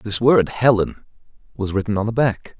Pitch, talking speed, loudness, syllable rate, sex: 110 Hz, 140 wpm, -19 LUFS, 4.9 syllables/s, male